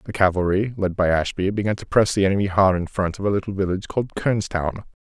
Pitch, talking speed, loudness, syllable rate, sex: 95 Hz, 225 wpm, -21 LUFS, 6.5 syllables/s, male